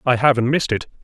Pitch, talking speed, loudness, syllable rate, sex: 125 Hz, 230 wpm, -18 LUFS, 7.3 syllables/s, male